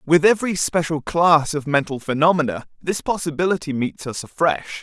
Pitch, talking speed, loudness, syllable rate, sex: 160 Hz, 150 wpm, -20 LUFS, 5.2 syllables/s, male